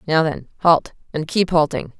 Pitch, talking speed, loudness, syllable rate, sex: 160 Hz, 150 wpm, -19 LUFS, 4.8 syllables/s, female